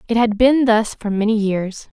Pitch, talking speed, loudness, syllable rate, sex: 220 Hz, 210 wpm, -17 LUFS, 4.6 syllables/s, female